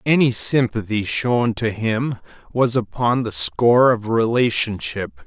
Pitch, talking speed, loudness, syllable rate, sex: 120 Hz, 125 wpm, -19 LUFS, 3.9 syllables/s, male